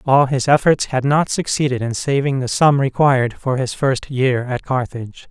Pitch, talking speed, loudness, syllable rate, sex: 130 Hz, 190 wpm, -17 LUFS, 4.8 syllables/s, male